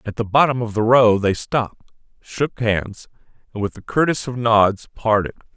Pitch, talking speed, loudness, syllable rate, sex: 115 Hz, 185 wpm, -19 LUFS, 4.8 syllables/s, male